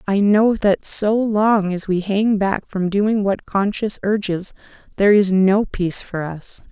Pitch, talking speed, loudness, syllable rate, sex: 200 Hz, 180 wpm, -18 LUFS, 4.2 syllables/s, female